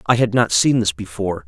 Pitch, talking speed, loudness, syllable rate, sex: 115 Hz, 245 wpm, -18 LUFS, 5.9 syllables/s, male